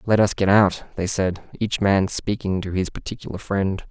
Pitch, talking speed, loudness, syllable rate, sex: 100 Hz, 200 wpm, -22 LUFS, 4.8 syllables/s, male